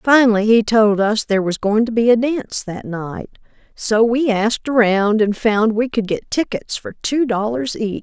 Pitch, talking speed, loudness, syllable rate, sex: 225 Hz, 200 wpm, -17 LUFS, 4.6 syllables/s, female